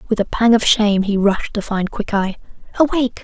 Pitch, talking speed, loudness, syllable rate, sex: 215 Hz, 205 wpm, -17 LUFS, 5.6 syllables/s, female